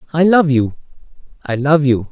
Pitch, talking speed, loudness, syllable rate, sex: 145 Hz, 140 wpm, -15 LUFS, 5.2 syllables/s, male